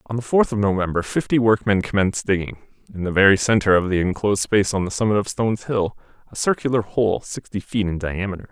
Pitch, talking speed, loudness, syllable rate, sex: 100 Hz, 210 wpm, -20 LUFS, 6.3 syllables/s, male